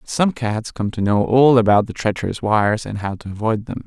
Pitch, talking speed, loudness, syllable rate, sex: 110 Hz, 250 wpm, -18 LUFS, 6.0 syllables/s, male